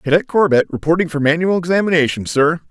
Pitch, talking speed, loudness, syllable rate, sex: 165 Hz, 155 wpm, -16 LUFS, 6.3 syllables/s, male